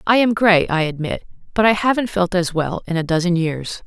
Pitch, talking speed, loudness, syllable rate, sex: 185 Hz, 235 wpm, -18 LUFS, 5.3 syllables/s, female